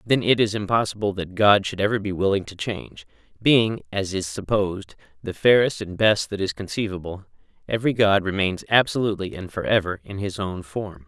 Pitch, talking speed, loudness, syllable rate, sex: 100 Hz, 185 wpm, -22 LUFS, 5.5 syllables/s, male